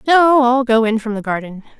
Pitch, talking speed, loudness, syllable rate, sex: 240 Hz, 235 wpm, -15 LUFS, 5.2 syllables/s, female